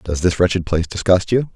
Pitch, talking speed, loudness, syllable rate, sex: 90 Hz, 230 wpm, -18 LUFS, 6.2 syllables/s, male